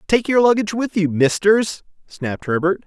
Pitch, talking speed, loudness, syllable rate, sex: 195 Hz, 165 wpm, -18 LUFS, 5.3 syllables/s, male